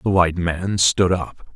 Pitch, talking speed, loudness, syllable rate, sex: 90 Hz, 195 wpm, -19 LUFS, 4.3 syllables/s, male